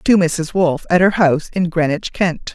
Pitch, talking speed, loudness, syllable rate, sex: 170 Hz, 210 wpm, -16 LUFS, 4.9 syllables/s, female